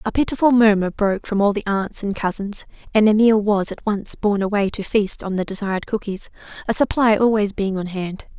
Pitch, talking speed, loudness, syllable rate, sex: 205 Hz, 210 wpm, -20 LUFS, 5.6 syllables/s, female